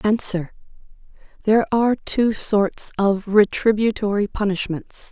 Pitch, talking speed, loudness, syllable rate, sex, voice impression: 210 Hz, 80 wpm, -20 LUFS, 4.5 syllables/s, female, very feminine, adult-like, slightly intellectual, elegant